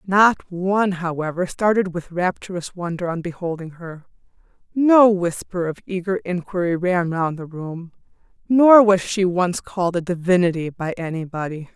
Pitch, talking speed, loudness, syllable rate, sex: 180 Hz, 145 wpm, -20 LUFS, 4.6 syllables/s, female